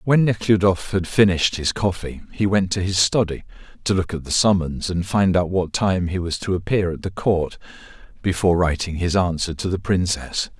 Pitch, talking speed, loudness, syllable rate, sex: 90 Hz, 200 wpm, -21 LUFS, 5.2 syllables/s, male